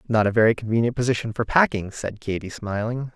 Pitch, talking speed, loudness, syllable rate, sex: 115 Hz, 190 wpm, -23 LUFS, 6.0 syllables/s, male